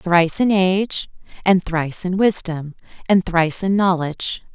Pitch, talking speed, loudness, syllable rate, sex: 180 Hz, 145 wpm, -19 LUFS, 4.8 syllables/s, female